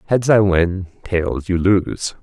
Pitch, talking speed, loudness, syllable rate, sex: 95 Hz, 160 wpm, -17 LUFS, 3.3 syllables/s, male